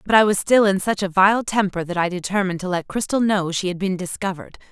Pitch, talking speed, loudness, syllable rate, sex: 190 Hz, 255 wpm, -20 LUFS, 6.4 syllables/s, female